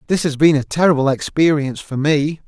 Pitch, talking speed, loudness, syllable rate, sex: 150 Hz, 195 wpm, -16 LUFS, 5.8 syllables/s, male